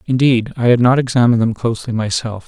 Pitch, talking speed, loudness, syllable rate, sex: 120 Hz, 195 wpm, -15 LUFS, 6.6 syllables/s, male